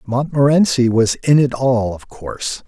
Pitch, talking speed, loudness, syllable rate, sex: 125 Hz, 155 wpm, -16 LUFS, 4.3 syllables/s, male